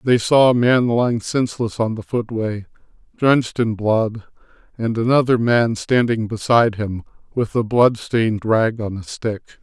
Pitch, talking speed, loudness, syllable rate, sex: 115 Hz, 160 wpm, -18 LUFS, 4.7 syllables/s, male